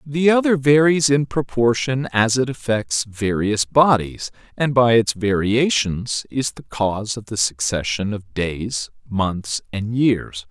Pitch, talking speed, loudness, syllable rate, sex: 115 Hz, 145 wpm, -19 LUFS, 3.8 syllables/s, male